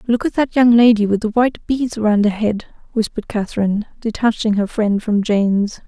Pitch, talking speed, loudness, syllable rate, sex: 220 Hz, 195 wpm, -17 LUFS, 5.5 syllables/s, female